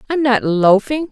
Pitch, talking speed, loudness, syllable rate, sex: 250 Hz, 160 wpm, -14 LUFS, 4.4 syllables/s, female